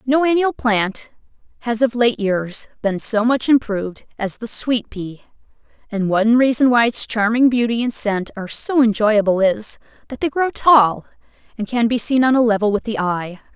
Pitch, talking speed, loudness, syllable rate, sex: 230 Hz, 185 wpm, -18 LUFS, 4.8 syllables/s, female